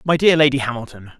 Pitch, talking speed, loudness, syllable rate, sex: 135 Hz, 200 wpm, -16 LUFS, 6.7 syllables/s, male